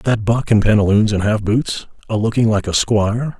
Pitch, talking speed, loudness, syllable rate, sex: 110 Hz, 195 wpm, -16 LUFS, 5.2 syllables/s, male